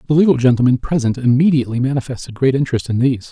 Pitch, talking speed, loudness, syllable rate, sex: 130 Hz, 180 wpm, -16 LUFS, 7.7 syllables/s, male